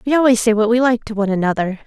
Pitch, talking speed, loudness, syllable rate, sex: 225 Hz, 290 wpm, -16 LUFS, 7.6 syllables/s, female